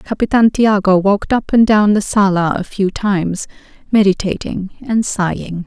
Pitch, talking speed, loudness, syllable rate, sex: 200 Hz, 150 wpm, -15 LUFS, 4.5 syllables/s, female